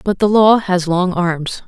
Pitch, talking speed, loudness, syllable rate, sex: 185 Hz, 215 wpm, -14 LUFS, 3.9 syllables/s, female